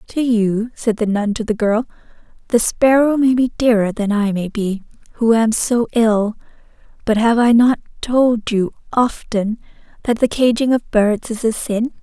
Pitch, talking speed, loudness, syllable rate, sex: 225 Hz, 180 wpm, -17 LUFS, 4.4 syllables/s, female